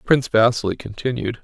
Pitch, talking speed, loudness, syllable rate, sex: 115 Hz, 125 wpm, -20 LUFS, 6.0 syllables/s, male